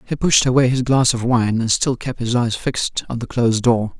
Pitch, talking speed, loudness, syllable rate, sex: 120 Hz, 255 wpm, -18 LUFS, 5.3 syllables/s, male